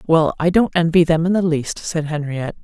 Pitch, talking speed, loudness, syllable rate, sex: 165 Hz, 205 wpm, -18 LUFS, 5.4 syllables/s, female